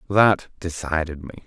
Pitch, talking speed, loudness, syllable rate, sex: 85 Hz, 125 wpm, -22 LUFS, 4.8 syllables/s, male